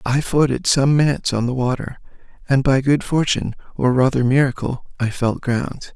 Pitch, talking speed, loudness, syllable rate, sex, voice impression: 130 Hz, 170 wpm, -19 LUFS, 5.1 syllables/s, male, slightly masculine, adult-like, slightly thin, slightly weak, cool, refreshing, calm, slightly friendly, reassuring, kind, modest